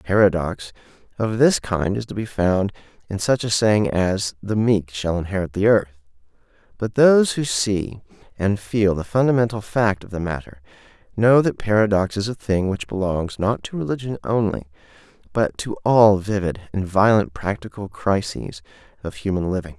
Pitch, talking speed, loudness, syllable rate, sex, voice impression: 100 Hz, 165 wpm, -20 LUFS, 4.8 syllables/s, male, masculine, middle-aged, powerful, hard, slightly halting, raspy, mature, slightly friendly, wild, lively, strict, intense